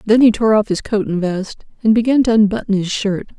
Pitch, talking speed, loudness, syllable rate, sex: 210 Hz, 250 wpm, -16 LUFS, 5.6 syllables/s, female